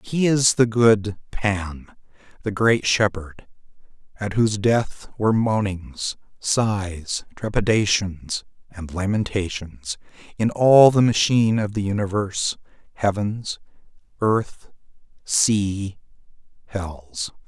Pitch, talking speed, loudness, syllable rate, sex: 100 Hz, 95 wpm, -21 LUFS, 3.5 syllables/s, male